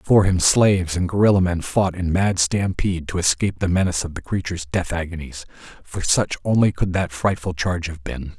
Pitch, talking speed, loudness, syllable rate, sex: 90 Hz, 200 wpm, -20 LUFS, 5.8 syllables/s, male